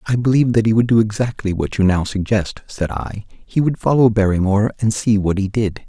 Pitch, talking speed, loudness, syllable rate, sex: 105 Hz, 225 wpm, -17 LUFS, 5.6 syllables/s, male